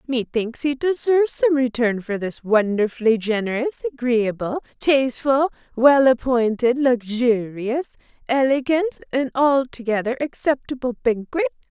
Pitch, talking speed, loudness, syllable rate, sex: 250 Hz, 95 wpm, -20 LUFS, 4.5 syllables/s, female